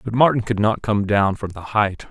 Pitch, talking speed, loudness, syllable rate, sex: 105 Hz, 255 wpm, -20 LUFS, 5.0 syllables/s, male